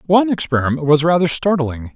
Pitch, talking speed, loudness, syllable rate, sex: 160 Hz, 155 wpm, -16 LUFS, 6.2 syllables/s, male